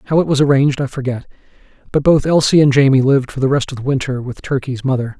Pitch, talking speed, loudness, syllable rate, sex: 135 Hz, 245 wpm, -15 LUFS, 6.9 syllables/s, male